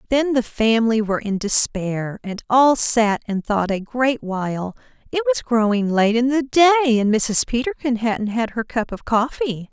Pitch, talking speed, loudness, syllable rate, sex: 235 Hz, 185 wpm, -19 LUFS, 4.6 syllables/s, female